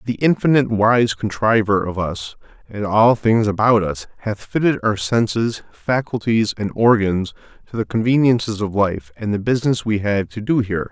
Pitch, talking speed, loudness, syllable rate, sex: 110 Hz, 170 wpm, -18 LUFS, 4.9 syllables/s, male